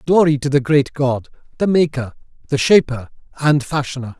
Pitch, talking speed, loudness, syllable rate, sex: 140 Hz, 155 wpm, -17 LUFS, 5.2 syllables/s, male